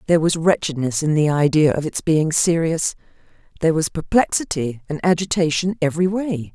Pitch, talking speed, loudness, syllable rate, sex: 160 Hz, 155 wpm, -19 LUFS, 5.5 syllables/s, female